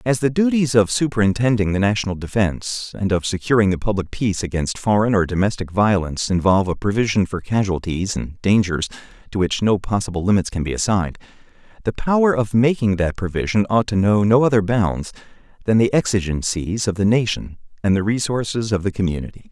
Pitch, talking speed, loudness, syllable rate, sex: 105 Hz, 180 wpm, -19 LUFS, 5.9 syllables/s, male